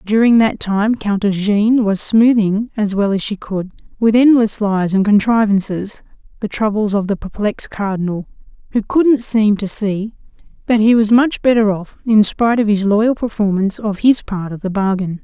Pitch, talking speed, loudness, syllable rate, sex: 210 Hz, 180 wpm, -15 LUFS, 4.9 syllables/s, female